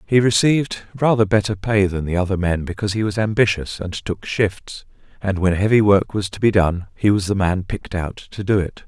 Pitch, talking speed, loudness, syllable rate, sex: 100 Hz, 225 wpm, -19 LUFS, 5.5 syllables/s, male